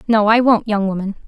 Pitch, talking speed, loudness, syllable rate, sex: 210 Hz, 235 wpm, -16 LUFS, 5.7 syllables/s, female